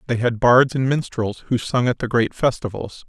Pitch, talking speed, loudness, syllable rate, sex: 120 Hz, 215 wpm, -20 LUFS, 5.0 syllables/s, male